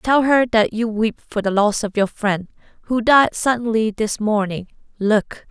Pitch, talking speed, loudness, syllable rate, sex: 220 Hz, 185 wpm, -18 LUFS, 4.2 syllables/s, female